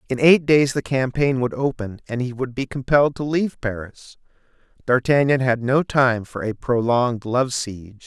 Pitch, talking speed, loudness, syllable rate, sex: 125 Hz, 180 wpm, -20 LUFS, 4.9 syllables/s, male